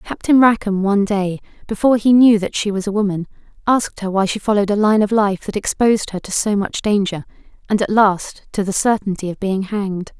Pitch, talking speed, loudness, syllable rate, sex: 205 Hz, 220 wpm, -17 LUFS, 5.9 syllables/s, female